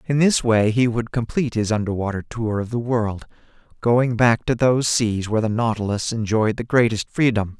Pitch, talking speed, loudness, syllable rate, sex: 115 Hz, 190 wpm, -20 LUFS, 5.2 syllables/s, male